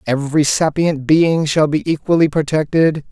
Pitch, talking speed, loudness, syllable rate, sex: 155 Hz, 135 wpm, -15 LUFS, 4.8 syllables/s, male